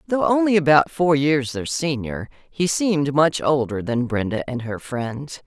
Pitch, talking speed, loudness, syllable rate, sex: 145 Hz, 175 wpm, -20 LUFS, 4.3 syllables/s, female